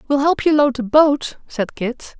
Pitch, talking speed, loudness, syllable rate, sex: 275 Hz, 220 wpm, -17 LUFS, 4.2 syllables/s, female